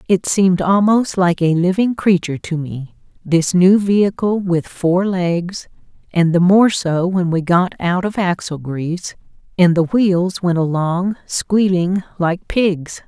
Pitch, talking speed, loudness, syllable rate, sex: 180 Hz, 155 wpm, -16 LUFS, 3.9 syllables/s, female